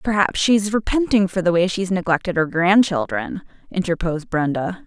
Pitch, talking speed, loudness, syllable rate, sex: 185 Hz, 160 wpm, -19 LUFS, 5.4 syllables/s, female